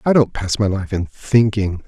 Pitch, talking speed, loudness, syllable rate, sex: 105 Hz, 225 wpm, -18 LUFS, 4.6 syllables/s, male